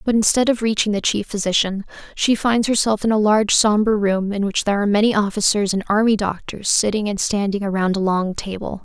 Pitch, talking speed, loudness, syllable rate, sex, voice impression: 205 Hz, 210 wpm, -18 LUFS, 5.8 syllables/s, female, very feminine, very young, very thin, very tensed, powerful, very bright, soft, very clear, very fluent, very cute, intellectual, very refreshing, sincere, calm, mature, very friendly, very reassuring, very unique, very elegant, slightly wild, very sweet, lively, kind, slightly intense, very light